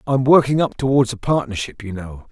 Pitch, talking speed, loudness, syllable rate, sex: 120 Hz, 235 wpm, -18 LUFS, 6.0 syllables/s, male